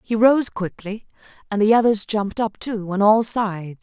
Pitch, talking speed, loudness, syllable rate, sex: 210 Hz, 190 wpm, -20 LUFS, 4.9 syllables/s, female